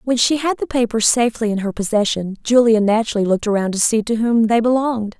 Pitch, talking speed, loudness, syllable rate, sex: 225 Hz, 220 wpm, -17 LUFS, 6.4 syllables/s, female